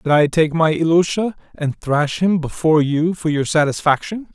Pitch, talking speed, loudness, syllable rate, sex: 160 Hz, 180 wpm, -17 LUFS, 4.9 syllables/s, male